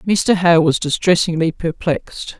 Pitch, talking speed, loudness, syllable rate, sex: 170 Hz, 125 wpm, -16 LUFS, 4.4 syllables/s, female